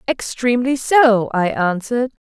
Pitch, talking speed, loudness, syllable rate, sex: 235 Hz, 105 wpm, -17 LUFS, 4.6 syllables/s, female